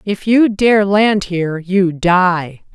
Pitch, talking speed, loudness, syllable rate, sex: 190 Hz, 155 wpm, -14 LUFS, 3.1 syllables/s, female